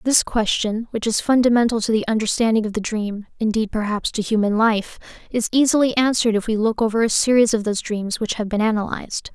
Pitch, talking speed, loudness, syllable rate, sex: 220 Hz, 205 wpm, -20 LUFS, 6.0 syllables/s, female